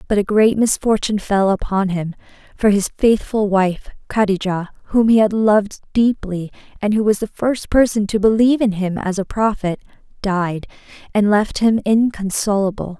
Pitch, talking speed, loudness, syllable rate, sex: 205 Hz, 160 wpm, -17 LUFS, 4.9 syllables/s, female